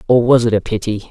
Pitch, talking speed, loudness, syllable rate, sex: 115 Hz, 270 wpm, -15 LUFS, 6.3 syllables/s, female